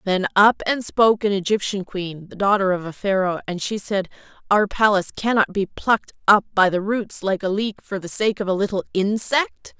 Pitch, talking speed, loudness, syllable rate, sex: 200 Hz, 195 wpm, -21 LUFS, 5.1 syllables/s, female